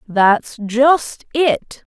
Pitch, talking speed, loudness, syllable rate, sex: 250 Hz, 95 wpm, -16 LUFS, 1.9 syllables/s, female